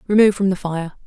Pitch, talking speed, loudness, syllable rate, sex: 190 Hz, 225 wpm, -18 LUFS, 7.2 syllables/s, female